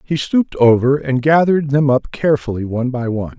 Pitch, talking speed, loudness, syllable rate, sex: 135 Hz, 195 wpm, -16 LUFS, 6.1 syllables/s, male